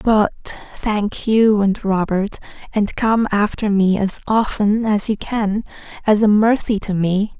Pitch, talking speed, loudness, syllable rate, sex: 210 Hz, 155 wpm, -18 LUFS, 3.7 syllables/s, female